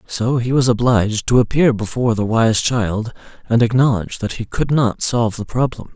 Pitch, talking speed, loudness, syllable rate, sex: 115 Hz, 190 wpm, -17 LUFS, 5.3 syllables/s, male